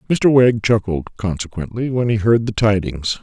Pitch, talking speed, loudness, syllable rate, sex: 105 Hz, 165 wpm, -17 LUFS, 4.8 syllables/s, male